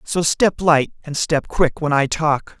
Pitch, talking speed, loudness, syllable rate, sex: 155 Hz, 210 wpm, -18 LUFS, 3.8 syllables/s, male